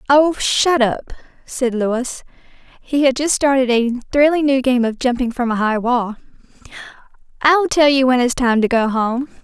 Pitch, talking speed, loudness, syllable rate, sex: 255 Hz, 180 wpm, -16 LUFS, 2.6 syllables/s, female